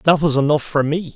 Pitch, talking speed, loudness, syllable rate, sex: 150 Hz, 260 wpm, -18 LUFS, 5.8 syllables/s, male